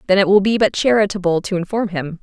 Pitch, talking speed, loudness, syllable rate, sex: 195 Hz, 245 wpm, -17 LUFS, 6.3 syllables/s, female